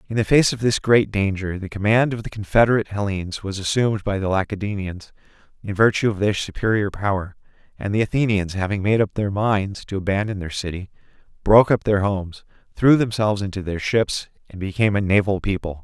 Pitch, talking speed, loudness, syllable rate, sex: 100 Hz, 190 wpm, -21 LUFS, 6.0 syllables/s, male